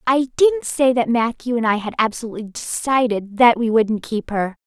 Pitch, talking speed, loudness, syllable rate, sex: 235 Hz, 195 wpm, -19 LUFS, 5.1 syllables/s, female